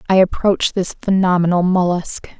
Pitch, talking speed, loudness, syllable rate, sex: 180 Hz, 125 wpm, -16 LUFS, 5.2 syllables/s, female